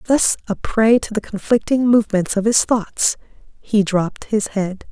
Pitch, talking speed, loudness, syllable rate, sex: 215 Hz, 170 wpm, -18 LUFS, 4.5 syllables/s, female